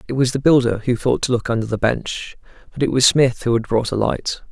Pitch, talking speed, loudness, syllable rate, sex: 120 Hz, 265 wpm, -18 LUFS, 5.7 syllables/s, male